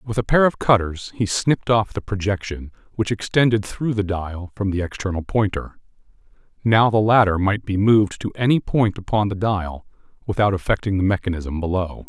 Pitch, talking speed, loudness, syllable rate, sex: 100 Hz, 175 wpm, -20 LUFS, 5.3 syllables/s, male